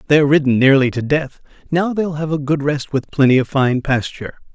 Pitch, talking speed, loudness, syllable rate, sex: 145 Hz, 210 wpm, -16 LUFS, 5.6 syllables/s, male